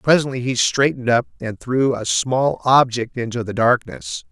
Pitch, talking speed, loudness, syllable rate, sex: 125 Hz, 165 wpm, -19 LUFS, 4.7 syllables/s, male